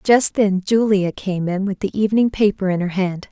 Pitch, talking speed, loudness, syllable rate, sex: 200 Hz, 215 wpm, -18 LUFS, 5.0 syllables/s, female